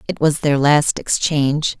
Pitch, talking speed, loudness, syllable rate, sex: 145 Hz, 165 wpm, -17 LUFS, 4.4 syllables/s, female